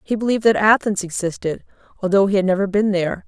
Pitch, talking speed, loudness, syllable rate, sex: 200 Hz, 200 wpm, -18 LUFS, 6.7 syllables/s, female